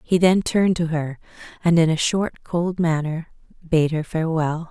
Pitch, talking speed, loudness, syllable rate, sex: 165 Hz, 180 wpm, -21 LUFS, 4.7 syllables/s, female